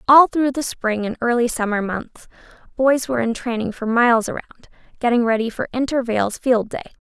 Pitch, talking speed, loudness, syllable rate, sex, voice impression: 240 Hz, 180 wpm, -19 LUFS, 5.8 syllables/s, female, very feminine, young, very thin, tensed, slightly powerful, very bright, slightly hard, very clear, very fluent, raspy, cute, slightly intellectual, very refreshing, sincere, slightly calm, very friendly, very reassuring, very unique, slightly elegant, wild, slightly sweet, very lively, slightly kind, intense, sharp, very light